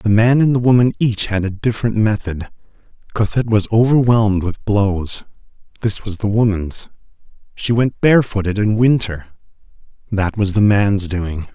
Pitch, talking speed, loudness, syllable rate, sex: 105 Hz, 140 wpm, -16 LUFS, 4.9 syllables/s, male